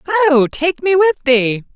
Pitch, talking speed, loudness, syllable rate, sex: 310 Hz, 170 wpm, -14 LUFS, 3.8 syllables/s, female